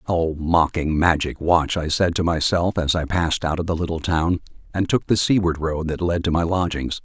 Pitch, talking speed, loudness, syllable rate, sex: 85 Hz, 220 wpm, -21 LUFS, 5.1 syllables/s, male